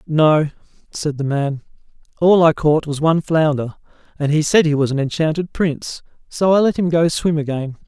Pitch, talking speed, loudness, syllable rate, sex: 155 Hz, 190 wpm, -17 LUFS, 5.2 syllables/s, male